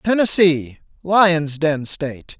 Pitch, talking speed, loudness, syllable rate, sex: 165 Hz, 100 wpm, -17 LUFS, 3.3 syllables/s, male